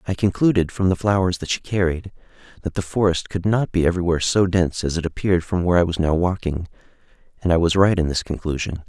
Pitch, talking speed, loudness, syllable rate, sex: 90 Hz, 225 wpm, -20 LUFS, 6.6 syllables/s, male